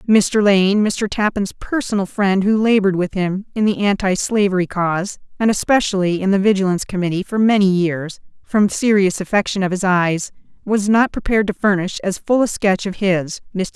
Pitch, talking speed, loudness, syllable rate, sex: 195 Hz, 185 wpm, -17 LUFS, 5.2 syllables/s, female